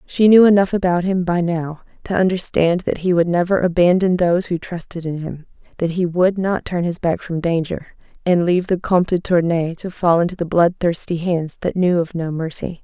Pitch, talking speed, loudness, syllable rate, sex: 175 Hz, 210 wpm, -18 LUFS, 5.2 syllables/s, female